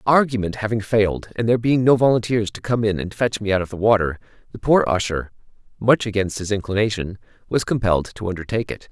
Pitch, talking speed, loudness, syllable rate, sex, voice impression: 105 Hz, 200 wpm, -20 LUFS, 6.3 syllables/s, male, masculine, adult-like, slightly thick, fluent, cool, sincere, slightly kind